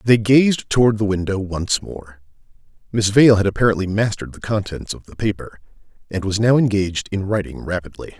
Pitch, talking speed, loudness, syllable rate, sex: 100 Hz, 175 wpm, -19 LUFS, 5.6 syllables/s, male